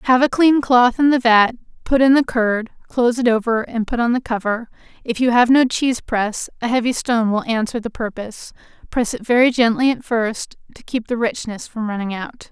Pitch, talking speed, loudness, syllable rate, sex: 235 Hz, 215 wpm, -18 LUFS, 5.4 syllables/s, female